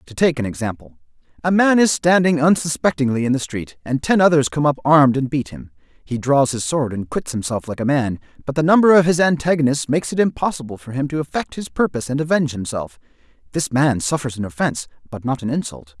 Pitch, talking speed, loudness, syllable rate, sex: 140 Hz, 220 wpm, -19 LUFS, 6.2 syllables/s, male